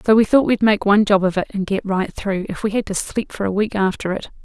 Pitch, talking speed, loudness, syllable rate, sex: 200 Hz, 310 wpm, -19 LUFS, 6.0 syllables/s, female